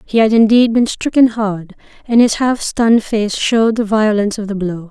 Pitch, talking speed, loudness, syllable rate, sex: 215 Hz, 210 wpm, -14 LUFS, 5.1 syllables/s, female